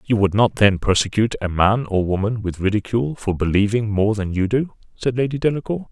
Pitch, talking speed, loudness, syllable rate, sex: 110 Hz, 205 wpm, -20 LUFS, 5.8 syllables/s, male